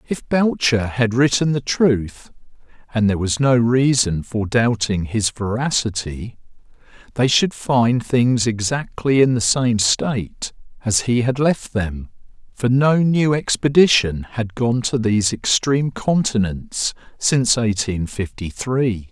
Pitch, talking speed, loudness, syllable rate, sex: 120 Hz, 130 wpm, -18 LUFS, 3.9 syllables/s, male